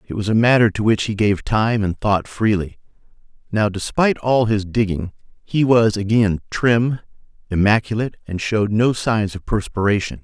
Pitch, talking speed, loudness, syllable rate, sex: 105 Hz, 165 wpm, -18 LUFS, 5.0 syllables/s, male